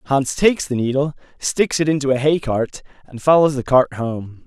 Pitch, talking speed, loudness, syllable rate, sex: 140 Hz, 200 wpm, -18 LUFS, 4.8 syllables/s, male